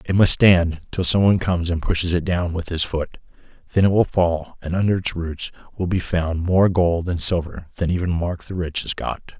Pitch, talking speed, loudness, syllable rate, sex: 85 Hz, 230 wpm, -20 LUFS, 5.1 syllables/s, male